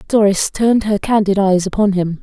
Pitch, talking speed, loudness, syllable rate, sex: 200 Hz, 190 wpm, -15 LUFS, 5.3 syllables/s, female